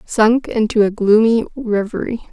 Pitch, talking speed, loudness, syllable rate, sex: 220 Hz, 130 wpm, -16 LUFS, 4.4 syllables/s, female